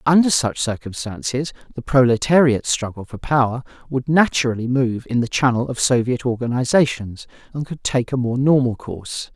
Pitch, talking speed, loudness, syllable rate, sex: 125 Hz, 155 wpm, -19 LUFS, 5.2 syllables/s, male